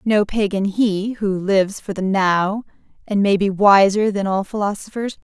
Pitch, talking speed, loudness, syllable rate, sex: 200 Hz, 170 wpm, -18 LUFS, 4.5 syllables/s, female